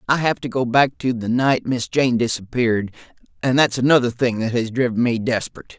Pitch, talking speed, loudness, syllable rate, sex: 120 Hz, 195 wpm, -19 LUFS, 5.7 syllables/s, male